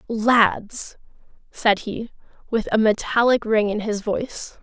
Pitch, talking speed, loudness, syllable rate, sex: 220 Hz, 130 wpm, -21 LUFS, 3.7 syllables/s, female